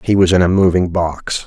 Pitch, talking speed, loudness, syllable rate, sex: 90 Hz, 245 wpm, -14 LUFS, 5.1 syllables/s, male